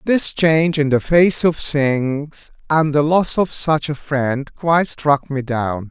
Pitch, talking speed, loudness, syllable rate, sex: 150 Hz, 185 wpm, -17 LUFS, 3.6 syllables/s, male